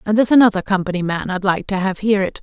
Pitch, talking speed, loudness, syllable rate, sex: 200 Hz, 275 wpm, -17 LUFS, 6.9 syllables/s, female